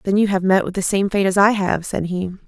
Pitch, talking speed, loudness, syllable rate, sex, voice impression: 190 Hz, 315 wpm, -18 LUFS, 5.9 syllables/s, female, feminine, adult-like, slightly sincere, slightly sweet